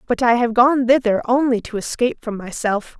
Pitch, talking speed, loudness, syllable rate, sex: 235 Hz, 200 wpm, -18 LUFS, 5.4 syllables/s, female